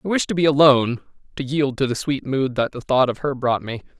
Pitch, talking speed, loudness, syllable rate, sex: 135 Hz, 270 wpm, -20 LUFS, 5.8 syllables/s, male